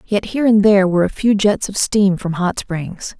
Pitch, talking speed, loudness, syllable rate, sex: 195 Hz, 245 wpm, -16 LUFS, 5.2 syllables/s, female